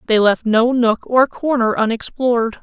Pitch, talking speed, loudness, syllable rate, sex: 235 Hz, 160 wpm, -16 LUFS, 4.6 syllables/s, female